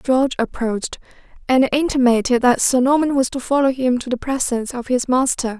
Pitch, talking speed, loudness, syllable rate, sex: 255 Hz, 180 wpm, -18 LUFS, 5.6 syllables/s, female